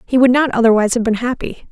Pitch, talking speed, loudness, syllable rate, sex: 240 Hz, 245 wpm, -14 LUFS, 6.9 syllables/s, female